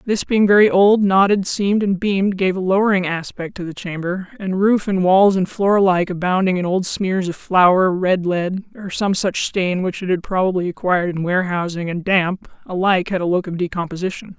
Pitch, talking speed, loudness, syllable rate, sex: 185 Hz, 205 wpm, -18 LUFS, 4.3 syllables/s, female